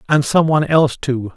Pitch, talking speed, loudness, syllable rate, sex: 140 Hz, 220 wpm, -16 LUFS, 6.0 syllables/s, male